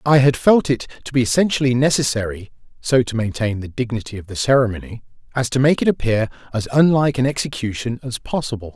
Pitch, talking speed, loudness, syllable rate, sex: 120 Hz, 185 wpm, -19 LUFS, 6.3 syllables/s, male